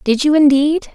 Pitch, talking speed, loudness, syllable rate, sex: 290 Hz, 190 wpm, -13 LUFS, 4.7 syllables/s, female